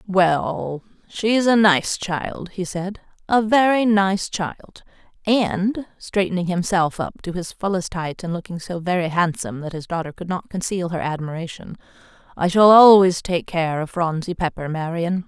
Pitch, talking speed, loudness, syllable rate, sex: 180 Hz, 160 wpm, -20 LUFS, 4.4 syllables/s, female